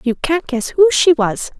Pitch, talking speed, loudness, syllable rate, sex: 290 Hz, 225 wpm, -15 LUFS, 4.3 syllables/s, female